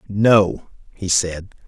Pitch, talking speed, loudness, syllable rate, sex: 100 Hz, 105 wpm, -17 LUFS, 2.6 syllables/s, male